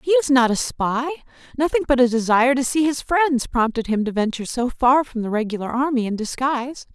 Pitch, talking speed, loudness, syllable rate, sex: 255 Hz, 215 wpm, -20 LUFS, 5.9 syllables/s, female